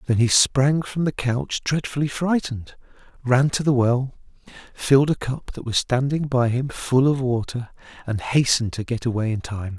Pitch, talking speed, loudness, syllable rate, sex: 125 Hz, 185 wpm, -22 LUFS, 4.9 syllables/s, male